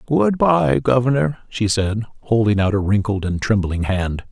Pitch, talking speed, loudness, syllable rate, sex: 105 Hz, 165 wpm, -19 LUFS, 4.4 syllables/s, male